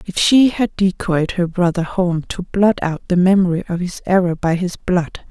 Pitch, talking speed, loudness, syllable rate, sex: 180 Hz, 205 wpm, -17 LUFS, 4.6 syllables/s, female